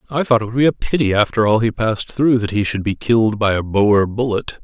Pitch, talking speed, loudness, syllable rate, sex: 110 Hz, 270 wpm, -17 LUFS, 5.9 syllables/s, male